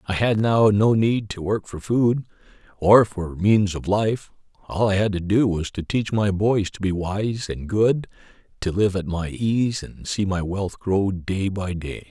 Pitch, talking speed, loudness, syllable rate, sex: 100 Hz, 210 wpm, -22 LUFS, 4.1 syllables/s, male